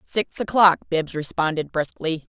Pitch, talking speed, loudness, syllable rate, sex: 170 Hz, 130 wpm, -22 LUFS, 4.4 syllables/s, female